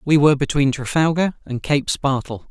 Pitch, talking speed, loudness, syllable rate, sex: 140 Hz, 170 wpm, -19 LUFS, 5.1 syllables/s, male